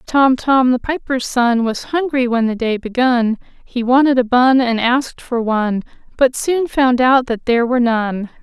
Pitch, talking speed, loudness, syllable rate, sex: 250 Hz, 190 wpm, -16 LUFS, 4.6 syllables/s, female